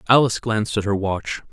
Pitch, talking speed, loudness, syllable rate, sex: 105 Hz, 195 wpm, -21 LUFS, 6.3 syllables/s, male